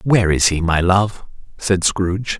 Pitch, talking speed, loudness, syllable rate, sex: 95 Hz, 175 wpm, -17 LUFS, 4.4 syllables/s, male